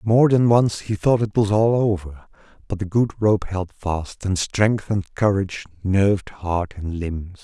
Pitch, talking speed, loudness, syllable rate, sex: 100 Hz, 185 wpm, -21 LUFS, 4.2 syllables/s, male